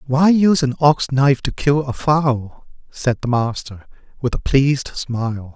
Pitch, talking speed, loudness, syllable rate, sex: 135 Hz, 175 wpm, -18 LUFS, 4.4 syllables/s, male